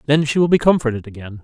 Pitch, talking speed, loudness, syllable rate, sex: 135 Hz, 250 wpm, -16 LUFS, 7.1 syllables/s, male